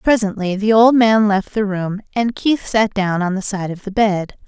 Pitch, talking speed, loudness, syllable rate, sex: 205 Hz, 230 wpm, -17 LUFS, 4.6 syllables/s, female